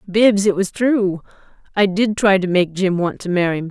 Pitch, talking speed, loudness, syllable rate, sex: 190 Hz, 225 wpm, -17 LUFS, 4.9 syllables/s, female